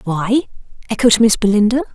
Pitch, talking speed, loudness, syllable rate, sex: 220 Hz, 125 wpm, -14 LUFS, 5.6 syllables/s, female